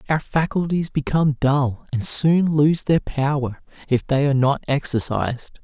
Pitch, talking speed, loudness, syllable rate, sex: 145 Hz, 150 wpm, -20 LUFS, 4.5 syllables/s, male